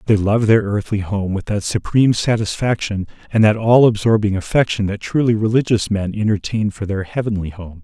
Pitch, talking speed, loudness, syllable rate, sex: 105 Hz, 175 wpm, -17 LUFS, 5.4 syllables/s, male